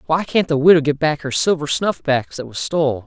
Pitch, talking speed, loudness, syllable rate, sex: 150 Hz, 235 wpm, -18 LUFS, 5.5 syllables/s, male